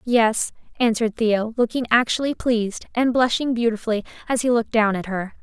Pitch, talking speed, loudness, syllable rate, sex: 230 Hz, 165 wpm, -21 LUFS, 5.7 syllables/s, female